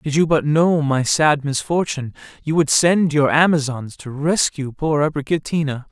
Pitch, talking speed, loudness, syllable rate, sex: 150 Hz, 160 wpm, -18 LUFS, 4.7 syllables/s, male